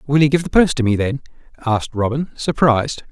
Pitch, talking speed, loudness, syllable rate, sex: 130 Hz, 210 wpm, -18 LUFS, 6.2 syllables/s, male